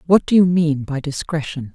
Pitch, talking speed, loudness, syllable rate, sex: 160 Hz, 205 wpm, -18 LUFS, 5.0 syllables/s, female